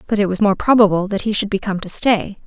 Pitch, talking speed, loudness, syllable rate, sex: 200 Hz, 290 wpm, -17 LUFS, 6.2 syllables/s, female